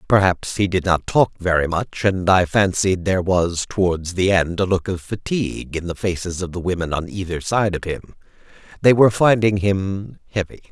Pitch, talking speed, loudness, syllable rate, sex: 95 Hz, 195 wpm, -19 LUFS, 5.0 syllables/s, male